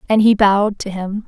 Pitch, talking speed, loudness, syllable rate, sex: 205 Hz, 235 wpm, -16 LUFS, 5.5 syllables/s, female